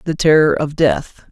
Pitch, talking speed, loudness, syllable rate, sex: 150 Hz, 185 wpm, -15 LUFS, 4.4 syllables/s, male